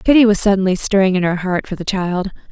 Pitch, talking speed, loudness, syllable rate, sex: 195 Hz, 240 wpm, -16 LUFS, 6.2 syllables/s, female